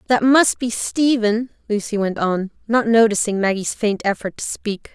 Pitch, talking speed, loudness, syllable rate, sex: 220 Hz, 170 wpm, -19 LUFS, 4.5 syllables/s, female